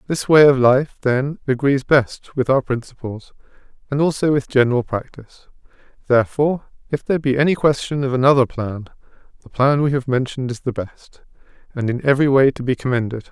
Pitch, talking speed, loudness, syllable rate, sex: 135 Hz, 175 wpm, -18 LUFS, 5.9 syllables/s, male